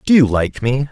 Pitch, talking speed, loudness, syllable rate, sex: 125 Hz, 260 wpm, -16 LUFS, 4.9 syllables/s, male